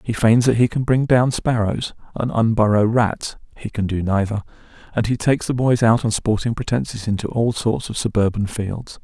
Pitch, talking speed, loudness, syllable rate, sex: 115 Hz, 200 wpm, -19 LUFS, 4.9 syllables/s, male